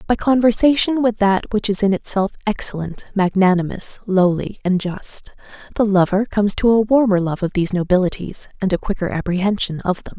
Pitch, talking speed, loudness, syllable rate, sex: 200 Hz, 170 wpm, -18 LUFS, 5.5 syllables/s, female